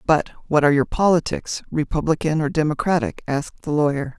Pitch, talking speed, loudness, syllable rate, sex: 150 Hz, 145 wpm, -21 LUFS, 5.8 syllables/s, female